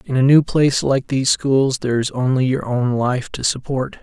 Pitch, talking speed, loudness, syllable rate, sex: 130 Hz, 225 wpm, -18 LUFS, 5.1 syllables/s, male